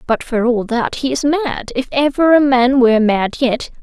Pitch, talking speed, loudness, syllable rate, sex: 255 Hz, 220 wpm, -15 LUFS, 4.6 syllables/s, female